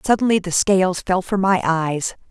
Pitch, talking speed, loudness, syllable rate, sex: 185 Hz, 185 wpm, -19 LUFS, 4.8 syllables/s, female